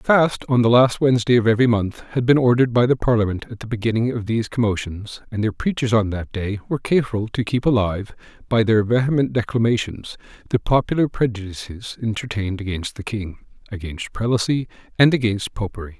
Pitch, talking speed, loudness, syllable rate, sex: 115 Hz, 180 wpm, -20 LUFS, 6.0 syllables/s, male